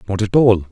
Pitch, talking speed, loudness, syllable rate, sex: 105 Hz, 250 wpm, -15 LUFS, 5.8 syllables/s, male